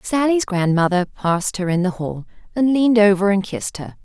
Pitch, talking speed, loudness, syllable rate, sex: 200 Hz, 195 wpm, -18 LUFS, 5.5 syllables/s, female